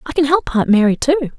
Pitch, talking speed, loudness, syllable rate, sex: 245 Hz, 260 wpm, -15 LUFS, 6.5 syllables/s, female